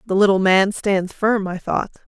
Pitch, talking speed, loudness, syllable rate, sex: 195 Hz, 195 wpm, -18 LUFS, 4.4 syllables/s, female